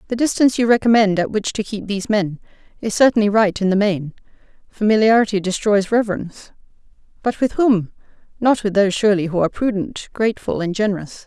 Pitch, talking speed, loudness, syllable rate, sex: 205 Hz, 165 wpm, -18 LUFS, 6.3 syllables/s, female